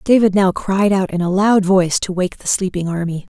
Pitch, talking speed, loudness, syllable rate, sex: 190 Hz, 235 wpm, -16 LUFS, 5.3 syllables/s, female